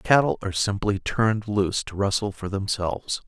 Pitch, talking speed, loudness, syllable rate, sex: 100 Hz, 185 wpm, -24 LUFS, 5.7 syllables/s, male